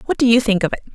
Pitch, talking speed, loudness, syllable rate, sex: 230 Hz, 380 wpm, -16 LUFS, 8.6 syllables/s, female